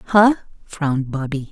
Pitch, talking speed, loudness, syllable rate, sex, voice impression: 160 Hz, 120 wpm, -19 LUFS, 4.3 syllables/s, female, feminine, slightly old, powerful, hard, clear, fluent, intellectual, calm, elegant, strict, sharp